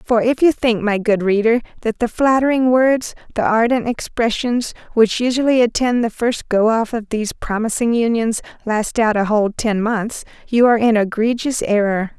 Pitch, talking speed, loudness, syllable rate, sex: 230 Hz, 175 wpm, -17 LUFS, 5.0 syllables/s, female